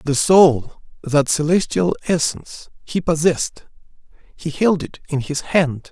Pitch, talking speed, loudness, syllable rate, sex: 155 Hz, 130 wpm, -18 LUFS, 4.3 syllables/s, male